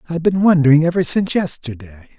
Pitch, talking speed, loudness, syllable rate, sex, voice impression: 155 Hz, 165 wpm, -15 LUFS, 7.3 syllables/s, male, slightly middle-aged, slightly old, relaxed, slightly weak, muffled, halting, slightly calm, mature, friendly, slightly reassuring, kind, slightly modest